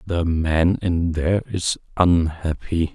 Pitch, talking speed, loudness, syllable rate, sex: 85 Hz, 120 wpm, -21 LUFS, 3.6 syllables/s, male